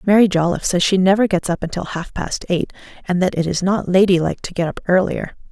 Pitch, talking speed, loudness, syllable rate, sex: 185 Hz, 240 wpm, -18 LUFS, 6.0 syllables/s, female